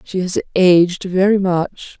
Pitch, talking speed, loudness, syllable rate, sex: 185 Hz, 150 wpm, -15 LUFS, 4.0 syllables/s, female